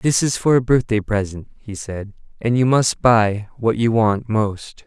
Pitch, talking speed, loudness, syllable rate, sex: 110 Hz, 195 wpm, -18 LUFS, 4.1 syllables/s, male